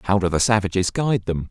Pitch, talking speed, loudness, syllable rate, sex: 100 Hz, 240 wpm, -20 LUFS, 6.7 syllables/s, male